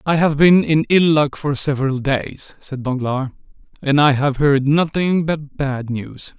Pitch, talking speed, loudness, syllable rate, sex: 145 Hz, 180 wpm, -17 LUFS, 4.1 syllables/s, male